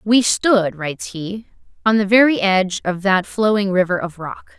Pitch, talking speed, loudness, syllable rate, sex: 200 Hz, 185 wpm, -17 LUFS, 4.8 syllables/s, female